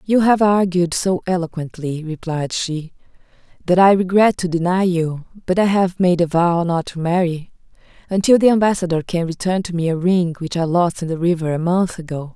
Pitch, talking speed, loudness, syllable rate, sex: 175 Hz, 195 wpm, -18 LUFS, 5.2 syllables/s, female